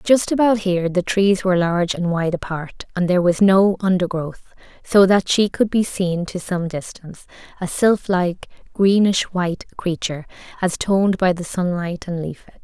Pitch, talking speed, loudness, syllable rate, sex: 185 Hz, 175 wpm, -19 LUFS, 5.0 syllables/s, female